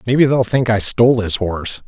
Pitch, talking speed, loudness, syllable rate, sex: 110 Hz, 225 wpm, -15 LUFS, 5.8 syllables/s, male